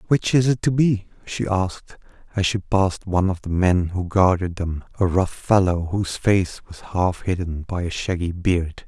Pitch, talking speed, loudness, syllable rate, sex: 95 Hz, 195 wpm, -21 LUFS, 4.7 syllables/s, male